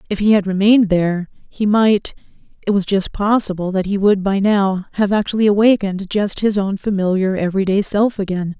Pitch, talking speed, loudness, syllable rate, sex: 200 Hz, 190 wpm, -17 LUFS, 5.5 syllables/s, female